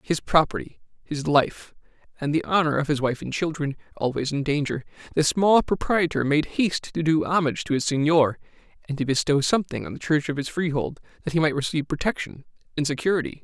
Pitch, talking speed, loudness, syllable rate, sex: 150 Hz, 190 wpm, -24 LUFS, 6.0 syllables/s, male